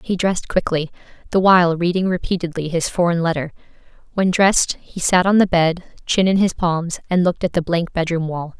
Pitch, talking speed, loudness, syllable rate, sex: 175 Hz, 195 wpm, -18 LUFS, 5.6 syllables/s, female